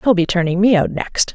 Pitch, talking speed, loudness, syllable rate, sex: 185 Hz, 270 wpm, -16 LUFS, 5.3 syllables/s, female